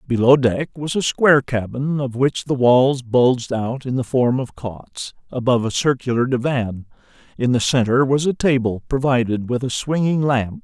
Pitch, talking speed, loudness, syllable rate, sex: 125 Hz, 180 wpm, -19 LUFS, 4.7 syllables/s, male